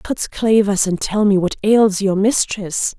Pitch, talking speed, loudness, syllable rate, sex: 205 Hz, 180 wpm, -16 LUFS, 3.9 syllables/s, female